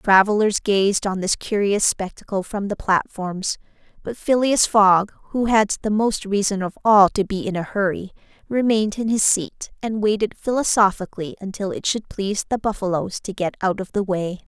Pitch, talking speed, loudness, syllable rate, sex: 200 Hz, 180 wpm, -20 LUFS, 5.0 syllables/s, female